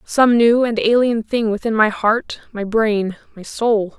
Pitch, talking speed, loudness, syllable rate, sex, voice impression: 225 Hz, 180 wpm, -17 LUFS, 4.2 syllables/s, female, feminine, adult-like, tensed, powerful, slightly bright, slightly hard, slightly raspy, intellectual, calm, slightly reassuring, elegant, lively, slightly strict, slightly sharp